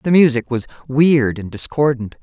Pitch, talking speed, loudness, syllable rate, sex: 135 Hz, 160 wpm, -17 LUFS, 4.6 syllables/s, female